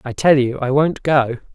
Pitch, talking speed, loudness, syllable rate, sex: 135 Hz, 235 wpm, -17 LUFS, 4.7 syllables/s, male